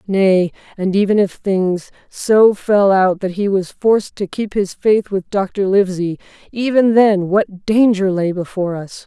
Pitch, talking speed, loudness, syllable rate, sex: 195 Hz, 170 wpm, -16 LUFS, 4.1 syllables/s, female